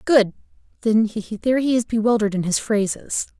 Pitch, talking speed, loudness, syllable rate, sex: 220 Hz, 140 wpm, -21 LUFS, 4.9 syllables/s, female